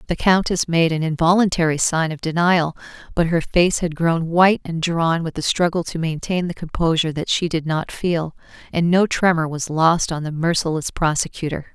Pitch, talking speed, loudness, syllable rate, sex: 165 Hz, 190 wpm, -19 LUFS, 5.1 syllables/s, female